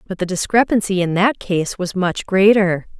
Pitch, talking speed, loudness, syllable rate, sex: 190 Hz, 180 wpm, -17 LUFS, 4.8 syllables/s, female